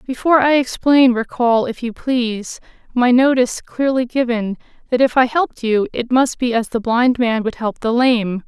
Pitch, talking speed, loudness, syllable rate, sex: 245 Hz, 190 wpm, -17 LUFS, 4.9 syllables/s, female